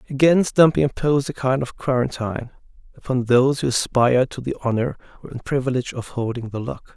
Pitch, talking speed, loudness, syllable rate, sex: 130 Hz, 170 wpm, -21 LUFS, 6.1 syllables/s, male